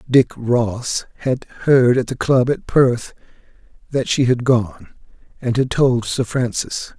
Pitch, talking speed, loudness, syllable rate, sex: 125 Hz, 155 wpm, -18 LUFS, 3.6 syllables/s, male